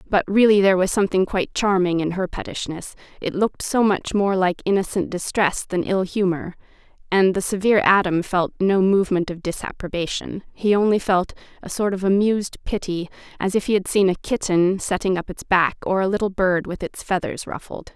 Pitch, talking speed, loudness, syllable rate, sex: 190 Hz, 190 wpm, -21 LUFS, 5.5 syllables/s, female